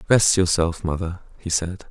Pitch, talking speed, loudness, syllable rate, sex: 90 Hz, 155 wpm, -21 LUFS, 4.5 syllables/s, male